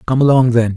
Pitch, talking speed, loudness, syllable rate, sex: 125 Hz, 235 wpm, -13 LUFS, 6.4 syllables/s, male